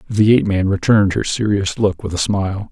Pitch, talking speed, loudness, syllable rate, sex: 100 Hz, 220 wpm, -16 LUFS, 5.9 syllables/s, male